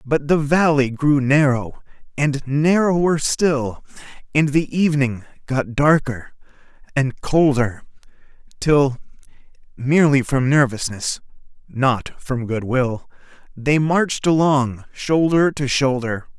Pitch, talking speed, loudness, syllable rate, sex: 140 Hz, 105 wpm, -19 LUFS, 3.4 syllables/s, male